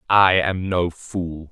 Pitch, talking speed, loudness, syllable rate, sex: 90 Hz, 160 wpm, -20 LUFS, 3.0 syllables/s, male